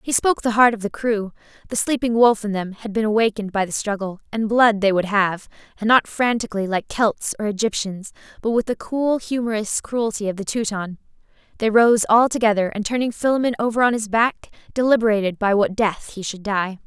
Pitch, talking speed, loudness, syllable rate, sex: 215 Hz, 200 wpm, -20 LUFS, 5.6 syllables/s, female